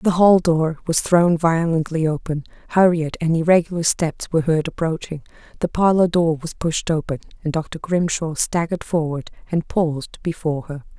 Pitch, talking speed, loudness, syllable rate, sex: 165 Hz, 160 wpm, -20 LUFS, 5.0 syllables/s, female